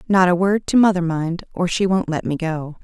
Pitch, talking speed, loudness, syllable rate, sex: 175 Hz, 255 wpm, -19 LUFS, 5.1 syllables/s, female